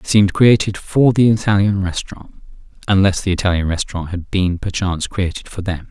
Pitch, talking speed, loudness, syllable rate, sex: 95 Hz, 175 wpm, -17 LUFS, 5.8 syllables/s, male